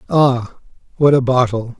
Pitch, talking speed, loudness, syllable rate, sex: 125 Hz, 135 wpm, -15 LUFS, 4.0 syllables/s, male